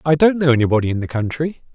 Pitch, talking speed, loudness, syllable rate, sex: 135 Hz, 240 wpm, -18 LUFS, 7.0 syllables/s, male